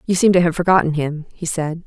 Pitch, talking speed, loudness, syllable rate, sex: 170 Hz, 260 wpm, -18 LUFS, 5.9 syllables/s, female